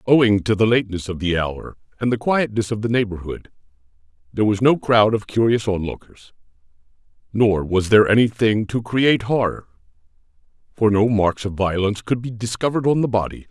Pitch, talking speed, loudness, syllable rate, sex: 110 Hz, 170 wpm, -19 LUFS, 5.7 syllables/s, male